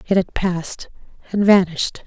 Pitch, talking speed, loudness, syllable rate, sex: 185 Hz, 145 wpm, -19 LUFS, 5.2 syllables/s, female